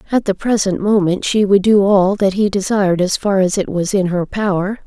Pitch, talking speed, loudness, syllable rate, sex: 195 Hz, 235 wpm, -15 LUFS, 5.3 syllables/s, female